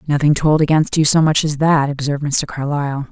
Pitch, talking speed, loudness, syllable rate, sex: 145 Hz, 210 wpm, -16 LUFS, 5.8 syllables/s, female